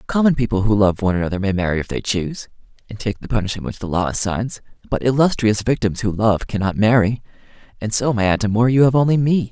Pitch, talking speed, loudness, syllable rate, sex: 110 Hz, 220 wpm, -19 LUFS, 6.4 syllables/s, male